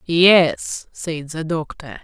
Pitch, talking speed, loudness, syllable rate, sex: 165 Hz, 120 wpm, -18 LUFS, 2.7 syllables/s, female